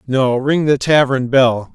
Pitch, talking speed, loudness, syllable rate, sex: 135 Hz, 170 wpm, -14 LUFS, 3.8 syllables/s, male